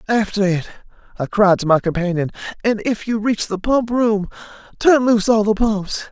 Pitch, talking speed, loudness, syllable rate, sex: 210 Hz, 185 wpm, -18 LUFS, 5.1 syllables/s, female